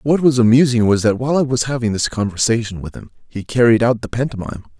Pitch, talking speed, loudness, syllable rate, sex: 120 Hz, 225 wpm, -16 LUFS, 6.5 syllables/s, male